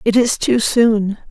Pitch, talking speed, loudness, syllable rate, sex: 220 Hz, 185 wpm, -15 LUFS, 3.6 syllables/s, female